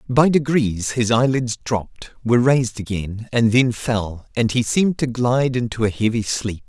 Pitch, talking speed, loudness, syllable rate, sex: 120 Hz, 180 wpm, -19 LUFS, 4.9 syllables/s, male